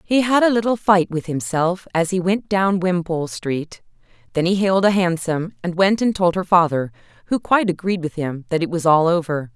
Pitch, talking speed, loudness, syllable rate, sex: 175 Hz, 215 wpm, -19 LUFS, 5.3 syllables/s, female